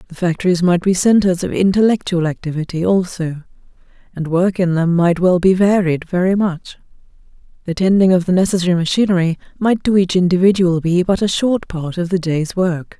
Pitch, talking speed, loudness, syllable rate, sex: 180 Hz, 175 wpm, -16 LUFS, 5.5 syllables/s, female